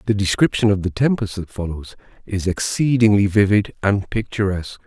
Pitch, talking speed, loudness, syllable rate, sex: 100 Hz, 150 wpm, -19 LUFS, 5.4 syllables/s, male